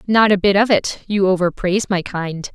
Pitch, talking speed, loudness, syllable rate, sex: 195 Hz, 210 wpm, -17 LUFS, 5.1 syllables/s, female